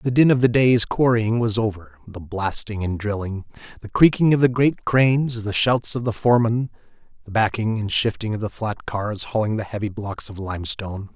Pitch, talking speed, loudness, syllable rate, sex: 110 Hz, 195 wpm, -21 LUFS, 5.2 syllables/s, male